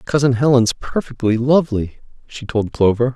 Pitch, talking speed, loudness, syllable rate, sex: 125 Hz, 135 wpm, -17 LUFS, 5.0 syllables/s, male